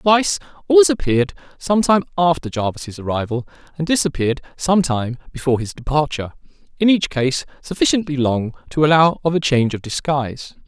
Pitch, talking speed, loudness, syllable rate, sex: 150 Hz, 150 wpm, -18 LUFS, 5.8 syllables/s, male